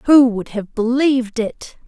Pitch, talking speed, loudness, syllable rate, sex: 240 Hz, 160 wpm, -17 LUFS, 4.0 syllables/s, female